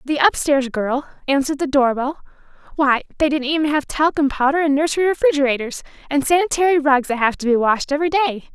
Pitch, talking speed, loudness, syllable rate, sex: 285 Hz, 185 wpm, -18 LUFS, 6.1 syllables/s, female